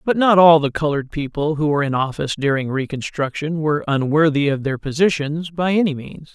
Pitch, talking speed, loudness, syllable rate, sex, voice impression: 150 Hz, 190 wpm, -18 LUFS, 5.8 syllables/s, male, masculine, adult-like, tensed, powerful, clear, slightly fluent, slightly nasal, friendly, unique, lively